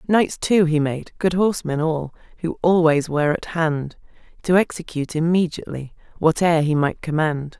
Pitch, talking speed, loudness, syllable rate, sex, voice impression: 160 Hz, 150 wpm, -20 LUFS, 5.2 syllables/s, female, slightly feminine, adult-like, slightly intellectual, slightly calm, slightly elegant